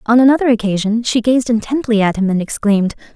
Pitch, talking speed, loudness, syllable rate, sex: 225 Hz, 190 wpm, -15 LUFS, 6.3 syllables/s, female